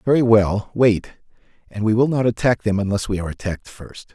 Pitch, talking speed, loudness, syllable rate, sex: 110 Hz, 205 wpm, -19 LUFS, 5.7 syllables/s, male